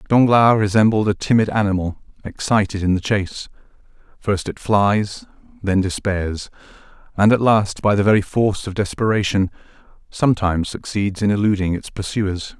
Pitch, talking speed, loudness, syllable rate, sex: 100 Hz, 140 wpm, -19 LUFS, 5.2 syllables/s, male